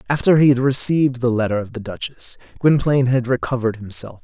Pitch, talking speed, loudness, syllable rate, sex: 125 Hz, 185 wpm, -18 LUFS, 6.2 syllables/s, male